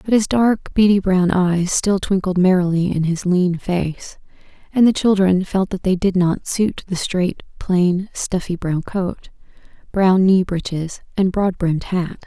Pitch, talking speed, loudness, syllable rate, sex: 185 Hz, 170 wpm, -18 LUFS, 4.1 syllables/s, female